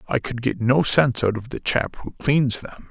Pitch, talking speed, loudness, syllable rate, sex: 125 Hz, 250 wpm, -22 LUFS, 5.0 syllables/s, male